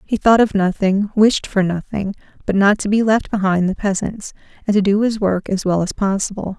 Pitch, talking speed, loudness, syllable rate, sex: 200 Hz, 220 wpm, -17 LUFS, 5.2 syllables/s, female